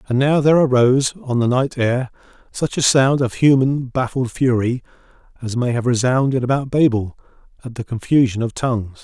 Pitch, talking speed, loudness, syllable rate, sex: 125 Hz, 175 wpm, -18 LUFS, 5.4 syllables/s, male